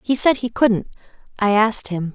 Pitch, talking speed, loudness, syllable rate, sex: 220 Hz, 170 wpm, -18 LUFS, 5.2 syllables/s, female